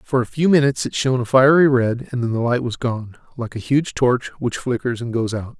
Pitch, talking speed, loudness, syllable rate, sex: 125 Hz, 255 wpm, -19 LUFS, 5.6 syllables/s, male